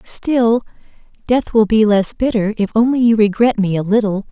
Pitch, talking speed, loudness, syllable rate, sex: 220 Hz, 180 wpm, -15 LUFS, 4.9 syllables/s, female